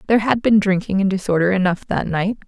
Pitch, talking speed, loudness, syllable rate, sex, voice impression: 195 Hz, 220 wpm, -18 LUFS, 6.3 syllables/s, female, very feminine, slightly young, slightly adult-like, very thin, relaxed, weak, dark, slightly hard, muffled, slightly halting, slightly raspy, very cute, very intellectual, refreshing, sincere, very calm, very friendly, very reassuring, unique, very elegant, slightly wild, very sweet, very kind, very modest, light